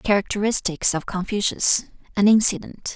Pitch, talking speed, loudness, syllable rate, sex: 200 Hz, 80 wpm, -20 LUFS, 5.0 syllables/s, female